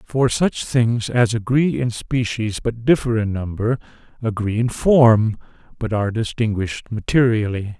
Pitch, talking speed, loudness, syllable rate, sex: 115 Hz, 140 wpm, -19 LUFS, 4.4 syllables/s, male